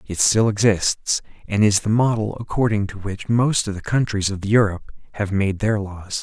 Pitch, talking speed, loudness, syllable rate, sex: 105 Hz, 195 wpm, -20 LUFS, 4.9 syllables/s, male